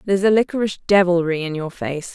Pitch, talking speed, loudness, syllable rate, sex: 180 Hz, 195 wpm, -19 LUFS, 6.2 syllables/s, female